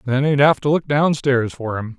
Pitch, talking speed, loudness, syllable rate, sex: 135 Hz, 240 wpm, -18 LUFS, 4.9 syllables/s, male